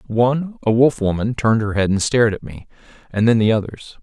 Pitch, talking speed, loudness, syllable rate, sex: 110 Hz, 225 wpm, -18 LUFS, 6.0 syllables/s, male